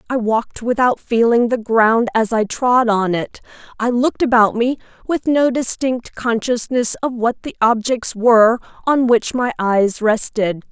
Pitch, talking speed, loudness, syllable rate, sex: 235 Hz, 160 wpm, -17 LUFS, 4.3 syllables/s, female